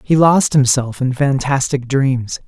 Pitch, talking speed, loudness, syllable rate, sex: 135 Hz, 145 wpm, -15 LUFS, 3.8 syllables/s, male